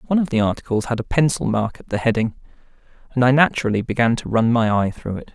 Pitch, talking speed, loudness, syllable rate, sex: 120 Hz, 235 wpm, -20 LUFS, 6.6 syllables/s, male